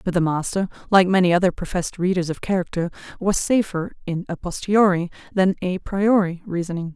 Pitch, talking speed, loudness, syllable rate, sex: 180 Hz, 165 wpm, -21 LUFS, 5.8 syllables/s, female